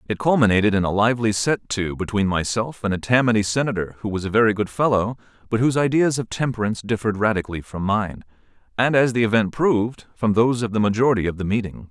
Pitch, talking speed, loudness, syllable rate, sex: 110 Hz, 205 wpm, -21 LUFS, 6.6 syllables/s, male